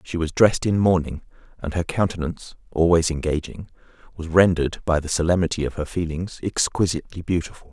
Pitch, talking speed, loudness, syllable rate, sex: 85 Hz, 155 wpm, -22 LUFS, 6.1 syllables/s, male